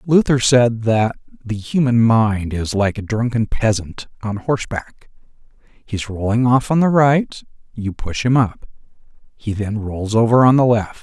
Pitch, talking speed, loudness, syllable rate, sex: 115 Hz, 170 wpm, -17 LUFS, 4.3 syllables/s, male